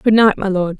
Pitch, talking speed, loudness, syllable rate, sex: 200 Hz, 300 wpm, -15 LUFS, 6.1 syllables/s, female